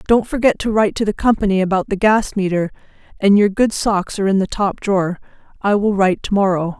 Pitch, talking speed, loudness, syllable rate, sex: 200 Hz, 220 wpm, -17 LUFS, 6.1 syllables/s, female